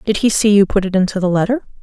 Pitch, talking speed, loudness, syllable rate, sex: 200 Hz, 295 wpm, -15 LUFS, 7.0 syllables/s, female